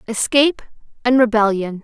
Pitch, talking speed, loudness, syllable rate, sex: 230 Hz, 100 wpm, -16 LUFS, 5.3 syllables/s, female